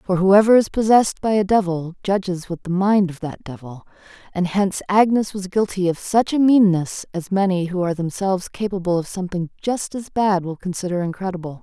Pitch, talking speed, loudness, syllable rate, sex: 190 Hz, 190 wpm, -20 LUFS, 5.6 syllables/s, female